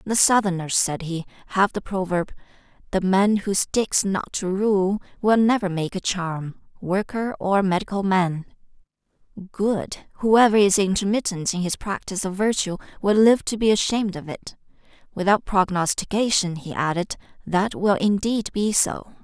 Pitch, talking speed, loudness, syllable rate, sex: 195 Hz, 150 wpm, -22 LUFS, 4.7 syllables/s, female